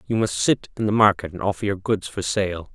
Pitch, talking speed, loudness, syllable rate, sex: 100 Hz, 260 wpm, -22 LUFS, 5.6 syllables/s, male